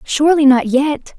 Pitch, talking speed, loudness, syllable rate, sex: 285 Hz, 150 wpm, -13 LUFS, 4.6 syllables/s, female